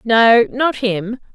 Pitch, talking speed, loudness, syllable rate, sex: 235 Hz, 135 wpm, -15 LUFS, 2.8 syllables/s, female